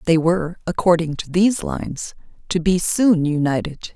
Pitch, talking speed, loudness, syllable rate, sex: 170 Hz, 150 wpm, -19 LUFS, 5.0 syllables/s, female